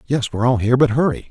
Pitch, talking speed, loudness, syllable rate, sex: 125 Hz, 275 wpm, -17 LUFS, 7.7 syllables/s, male